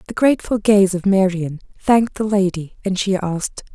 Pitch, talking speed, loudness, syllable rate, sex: 195 Hz, 175 wpm, -18 LUFS, 5.3 syllables/s, female